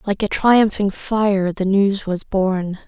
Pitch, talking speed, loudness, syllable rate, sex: 200 Hz, 165 wpm, -18 LUFS, 3.8 syllables/s, female